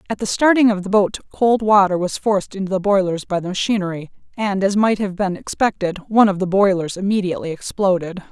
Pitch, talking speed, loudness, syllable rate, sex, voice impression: 195 Hz, 200 wpm, -18 LUFS, 6.1 syllables/s, female, very feminine, slightly young, slightly adult-like, thin, slightly relaxed, slightly weak, bright, slightly hard, clear, fluent, cute, slightly cool, intellectual, refreshing, slightly sincere, slightly calm, friendly, reassuring, unique, slightly elegant, slightly wild, sweet, lively, kind, slightly intense, slightly modest, light